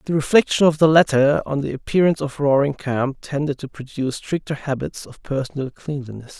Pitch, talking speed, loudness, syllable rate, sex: 145 Hz, 180 wpm, -20 LUFS, 5.7 syllables/s, male